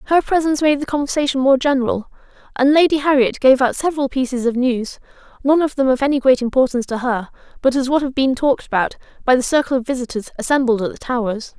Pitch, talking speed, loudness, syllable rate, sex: 265 Hz, 210 wpm, -17 LUFS, 6.5 syllables/s, female